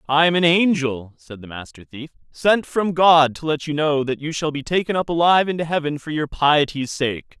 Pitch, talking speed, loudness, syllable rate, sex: 150 Hz, 225 wpm, -19 LUFS, 5.2 syllables/s, male